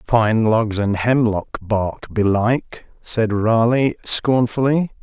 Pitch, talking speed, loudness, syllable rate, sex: 115 Hz, 110 wpm, -18 LUFS, 3.3 syllables/s, male